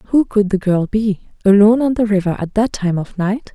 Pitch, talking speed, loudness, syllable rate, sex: 205 Hz, 235 wpm, -16 LUFS, 5.1 syllables/s, female